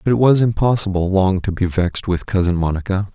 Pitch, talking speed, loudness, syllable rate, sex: 95 Hz, 210 wpm, -18 LUFS, 5.9 syllables/s, male